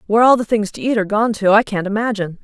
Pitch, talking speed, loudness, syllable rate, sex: 215 Hz, 295 wpm, -16 LUFS, 7.5 syllables/s, female